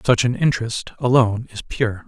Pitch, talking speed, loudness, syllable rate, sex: 120 Hz, 175 wpm, -20 LUFS, 5.3 syllables/s, male